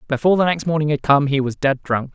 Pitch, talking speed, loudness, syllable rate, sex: 145 Hz, 280 wpm, -18 LUFS, 6.7 syllables/s, male